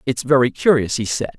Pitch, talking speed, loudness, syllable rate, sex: 130 Hz, 215 wpm, -17 LUFS, 5.8 syllables/s, male